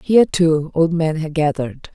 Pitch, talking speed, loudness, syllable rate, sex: 160 Hz, 185 wpm, -18 LUFS, 5.0 syllables/s, female